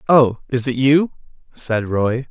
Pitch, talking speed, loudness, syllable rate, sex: 130 Hz, 155 wpm, -18 LUFS, 3.8 syllables/s, male